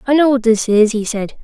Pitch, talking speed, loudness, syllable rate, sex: 235 Hz, 290 wpm, -14 LUFS, 5.5 syllables/s, female